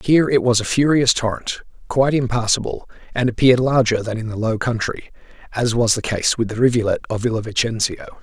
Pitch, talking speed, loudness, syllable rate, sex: 120 Hz, 190 wpm, -19 LUFS, 6.0 syllables/s, male